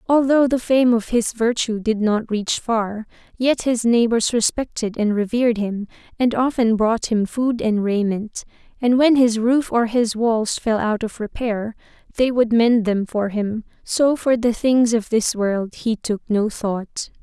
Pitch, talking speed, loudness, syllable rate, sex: 230 Hz, 180 wpm, -19 LUFS, 4.0 syllables/s, female